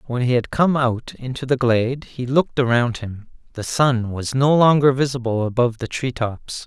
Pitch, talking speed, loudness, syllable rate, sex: 125 Hz, 200 wpm, -19 LUFS, 5.0 syllables/s, male